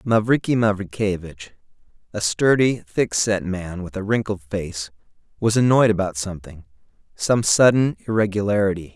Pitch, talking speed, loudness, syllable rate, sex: 100 Hz, 120 wpm, -20 LUFS, 4.8 syllables/s, male